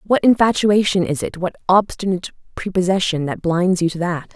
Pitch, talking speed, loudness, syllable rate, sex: 185 Hz, 165 wpm, -18 LUFS, 5.5 syllables/s, female